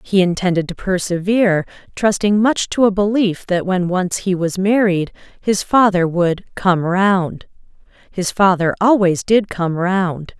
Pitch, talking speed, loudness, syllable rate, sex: 190 Hz, 150 wpm, -16 LUFS, 4.1 syllables/s, female